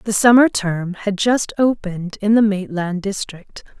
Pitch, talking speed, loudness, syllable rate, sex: 200 Hz, 160 wpm, -17 LUFS, 4.2 syllables/s, female